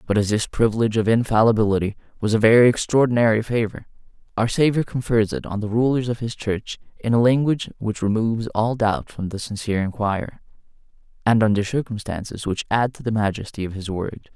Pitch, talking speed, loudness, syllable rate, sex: 110 Hz, 175 wpm, -21 LUFS, 5.9 syllables/s, male